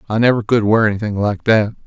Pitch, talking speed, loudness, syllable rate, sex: 110 Hz, 225 wpm, -16 LUFS, 6.5 syllables/s, male